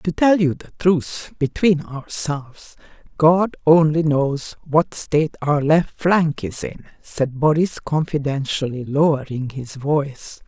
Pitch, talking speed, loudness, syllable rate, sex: 150 Hz, 130 wpm, -19 LUFS, 3.9 syllables/s, female